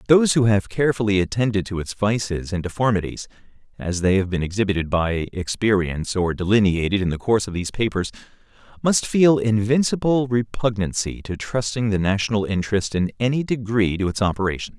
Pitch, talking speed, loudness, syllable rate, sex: 105 Hz, 160 wpm, -21 LUFS, 5.9 syllables/s, male